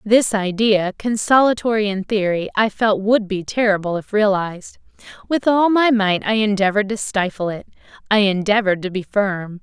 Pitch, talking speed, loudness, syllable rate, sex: 205 Hz, 155 wpm, -18 LUFS, 5.1 syllables/s, female